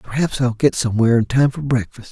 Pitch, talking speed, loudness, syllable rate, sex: 125 Hz, 225 wpm, -18 LUFS, 6.5 syllables/s, male